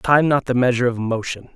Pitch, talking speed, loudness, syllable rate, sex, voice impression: 125 Hz, 230 wpm, -19 LUFS, 6.0 syllables/s, male, very masculine, very adult-like, thick, slightly tensed, slightly weak, slightly dark, soft, clear, slightly fluent, cool, intellectual, refreshing, slightly sincere, calm, friendly, reassuring, slightly unique, slightly elegant, slightly wild, sweet, slightly lively, kind, very modest